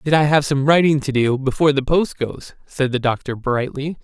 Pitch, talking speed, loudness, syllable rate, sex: 140 Hz, 210 wpm, -18 LUFS, 5.3 syllables/s, male